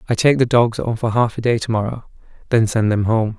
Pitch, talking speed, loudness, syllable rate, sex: 115 Hz, 265 wpm, -18 LUFS, 5.9 syllables/s, male